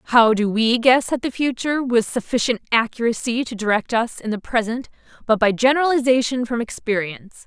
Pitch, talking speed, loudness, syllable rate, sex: 235 Hz, 170 wpm, -20 LUFS, 5.4 syllables/s, female